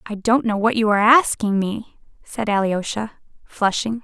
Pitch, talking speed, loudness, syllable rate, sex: 215 Hz, 165 wpm, -19 LUFS, 4.6 syllables/s, female